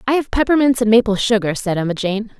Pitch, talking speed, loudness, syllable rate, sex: 220 Hz, 225 wpm, -16 LUFS, 6.4 syllables/s, female